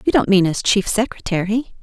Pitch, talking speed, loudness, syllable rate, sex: 210 Hz, 195 wpm, -18 LUFS, 5.5 syllables/s, female